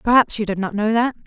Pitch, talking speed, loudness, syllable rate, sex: 220 Hz, 285 wpm, -19 LUFS, 6.5 syllables/s, female